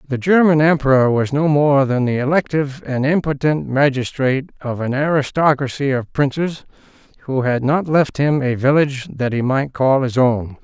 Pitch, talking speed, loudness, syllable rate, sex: 140 Hz, 170 wpm, -17 LUFS, 5.0 syllables/s, male